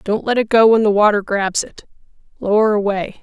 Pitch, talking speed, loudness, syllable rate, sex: 210 Hz, 205 wpm, -15 LUFS, 5.5 syllables/s, female